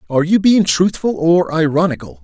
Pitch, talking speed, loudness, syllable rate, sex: 165 Hz, 160 wpm, -14 LUFS, 5.5 syllables/s, male